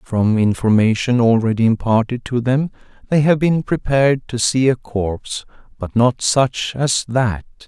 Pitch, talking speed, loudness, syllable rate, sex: 120 Hz, 150 wpm, -17 LUFS, 4.4 syllables/s, male